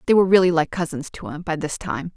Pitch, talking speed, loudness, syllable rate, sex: 170 Hz, 280 wpm, -21 LUFS, 6.6 syllables/s, female